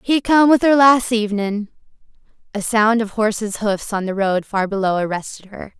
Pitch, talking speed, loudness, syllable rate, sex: 215 Hz, 185 wpm, -17 LUFS, 5.0 syllables/s, female